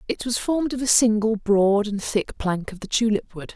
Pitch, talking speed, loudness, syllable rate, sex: 215 Hz, 235 wpm, -22 LUFS, 5.0 syllables/s, female